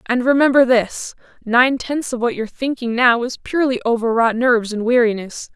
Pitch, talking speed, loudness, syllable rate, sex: 240 Hz, 175 wpm, -17 LUFS, 5.4 syllables/s, female